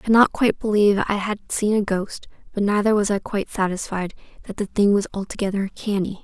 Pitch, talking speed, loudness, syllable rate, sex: 205 Hz, 210 wpm, -21 LUFS, 6.0 syllables/s, female